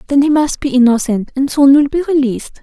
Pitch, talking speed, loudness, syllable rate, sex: 270 Hz, 230 wpm, -13 LUFS, 6.0 syllables/s, female